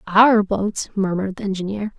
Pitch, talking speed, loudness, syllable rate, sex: 200 Hz, 150 wpm, -20 LUFS, 5.0 syllables/s, female